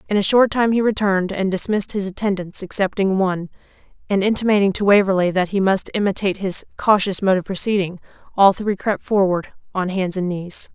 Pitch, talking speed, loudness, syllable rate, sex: 195 Hz, 185 wpm, -19 LUFS, 5.8 syllables/s, female